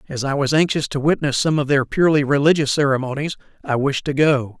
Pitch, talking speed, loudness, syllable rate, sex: 145 Hz, 210 wpm, -18 LUFS, 6.0 syllables/s, male